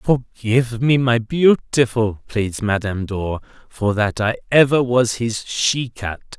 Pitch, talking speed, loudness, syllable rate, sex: 115 Hz, 140 wpm, -19 LUFS, 3.7 syllables/s, male